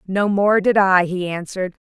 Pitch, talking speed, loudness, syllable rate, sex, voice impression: 190 Hz, 195 wpm, -18 LUFS, 4.9 syllables/s, female, feminine, slightly middle-aged, slightly fluent, slightly intellectual, slightly elegant, slightly strict